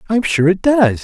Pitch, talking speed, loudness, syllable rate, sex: 185 Hz, 230 wpm, -14 LUFS, 4.4 syllables/s, male